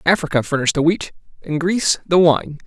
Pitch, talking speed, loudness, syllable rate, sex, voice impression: 160 Hz, 180 wpm, -17 LUFS, 5.9 syllables/s, male, very masculine, slightly middle-aged, slightly thick, very tensed, powerful, very bright, slightly soft, very clear, very fluent, slightly raspy, slightly cool, slightly intellectual, refreshing, slightly sincere, slightly calm, slightly mature, friendly, slightly reassuring, very unique, slightly elegant, wild, slightly sweet, very lively, very intense, sharp